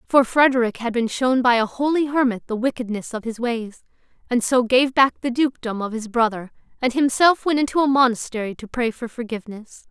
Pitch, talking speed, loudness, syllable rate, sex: 245 Hz, 200 wpm, -20 LUFS, 5.7 syllables/s, female